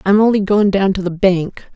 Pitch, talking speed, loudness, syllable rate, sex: 195 Hz, 240 wpm, -15 LUFS, 5.2 syllables/s, female